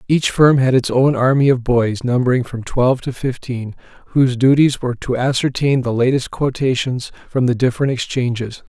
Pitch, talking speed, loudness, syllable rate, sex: 125 Hz, 170 wpm, -17 LUFS, 5.3 syllables/s, male